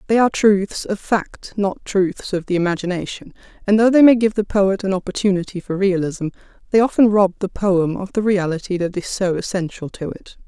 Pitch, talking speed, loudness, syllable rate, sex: 195 Hz, 200 wpm, -18 LUFS, 5.4 syllables/s, female